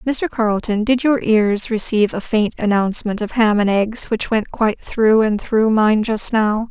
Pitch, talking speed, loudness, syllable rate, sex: 220 Hz, 195 wpm, -17 LUFS, 4.6 syllables/s, female